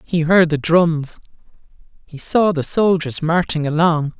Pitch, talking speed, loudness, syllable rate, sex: 165 Hz, 145 wpm, -16 LUFS, 4.0 syllables/s, male